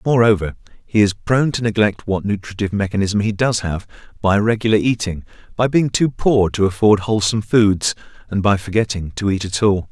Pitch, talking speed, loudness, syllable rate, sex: 105 Hz, 180 wpm, -18 LUFS, 5.7 syllables/s, male